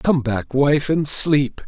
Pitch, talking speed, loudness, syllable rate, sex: 140 Hz, 180 wpm, -17 LUFS, 3.1 syllables/s, male